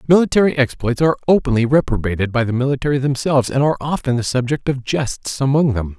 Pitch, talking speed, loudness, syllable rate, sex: 135 Hz, 180 wpm, -17 LUFS, 6.5 syllables/s, male